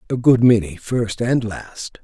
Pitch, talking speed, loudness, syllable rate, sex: 115 Hz, 175 wpm, -18 LUFS, 3.9 syllables/s, male